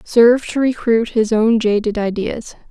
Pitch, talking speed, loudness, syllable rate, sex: 225 Hz, 155 wpm, -16 LUFS, 4.4 syllables/s, female